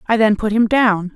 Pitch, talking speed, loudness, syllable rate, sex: 215 Hz, 260 wpm, -15 LUFS, 4.9 syllables/s, female